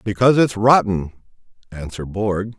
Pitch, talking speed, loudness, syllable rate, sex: 105 Hz, 115 wpm, -18 LUFS, 5.3 syllables/s, male